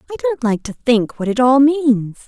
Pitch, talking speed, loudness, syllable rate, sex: 250 Hz, 235 wpm, -16 LUFS, 4.7 syllables/s, female